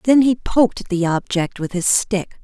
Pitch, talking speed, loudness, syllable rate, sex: 205 Hz, 195 wpm, -18 LUFS, 4.3 syllables/s, female